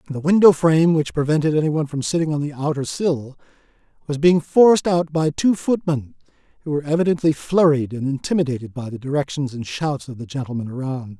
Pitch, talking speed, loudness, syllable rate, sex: 145 Hz, 180 wpm, -20 LUFS, 6.0 syllables/s, male